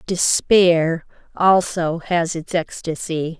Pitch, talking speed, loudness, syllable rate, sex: 170 Hz, 90 wpm, -19 LUFS, 3.0 syllables/s, female